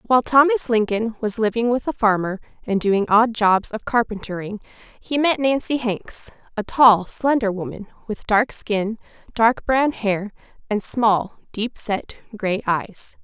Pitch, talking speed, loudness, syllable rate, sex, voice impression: 220 Hz, 155 wpm, -20 LUFS, 4.2 syllables/s, female, very feminine, slightly adult-like, slightly thin, tensed, slightly powerful, bright, hard, clear, fluent, cute, very intellectual, refreshing, sincere, slightly calm, friendly, reassuring, very unique, slightly elegant, wild, very sweet, very lively, slightly intense, very sharp, light